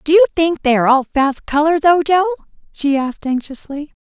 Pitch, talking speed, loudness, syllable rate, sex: 305 Hz, 180 wpm, -15 LUFS, 5.7 syllables/s, female